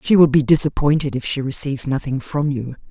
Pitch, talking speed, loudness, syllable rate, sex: 140 Hz, 205 wpm, -18 LUFS, 6.0 syllables/s, female